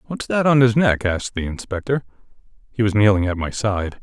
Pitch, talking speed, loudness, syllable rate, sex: 110 Hz, 195 wpm, -19 LUFS, 5.9 syllables/s, male